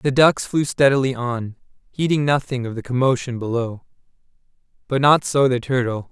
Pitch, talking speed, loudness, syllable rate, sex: 130 Hz, 155 wpm, -20 LUFS, 5.1 syllables/s, male